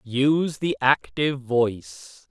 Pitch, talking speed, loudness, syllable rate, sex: 125 Hz, 105 wpm, -22 LUFS, 3.7 syllables/s, male